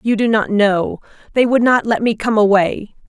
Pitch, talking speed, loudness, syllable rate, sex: 215 Hz, 215 wpm, -15 LUFS, 4.7 syllables/s, female